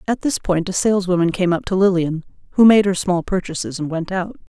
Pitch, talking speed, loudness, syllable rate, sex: 185 Hz, 220 wpm, -18 LUFS, 5.9 syllables/s, female